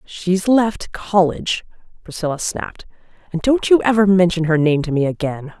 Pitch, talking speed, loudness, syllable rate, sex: 185 Hz, 160 wpm, -17 LUFS, 5.0 syllables/s, female